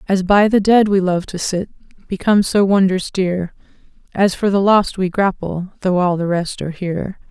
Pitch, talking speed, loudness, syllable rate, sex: 190 Hz, 195 wpm, -17 LUFS, 5.0 syllables/s, female